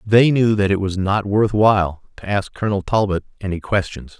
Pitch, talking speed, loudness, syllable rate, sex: 100 Hz, 200 wpm, -18 LUFS, 5.3 syllables/s, male